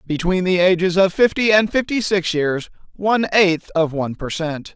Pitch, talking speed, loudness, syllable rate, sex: 180 Hz, 190 wpm, -18 LUFS, 4.9 syllables/s, male